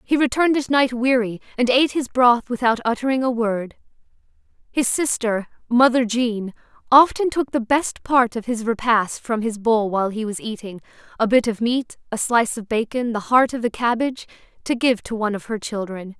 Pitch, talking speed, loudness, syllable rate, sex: 235 Hz, 185 wpm, -20 LUFS, 5.3 syllables/s, female